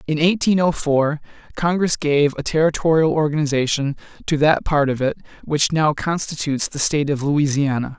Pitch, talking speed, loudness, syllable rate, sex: 150 Hz, 160 wpm, -19 LUFS, 5.2 syllables/s, male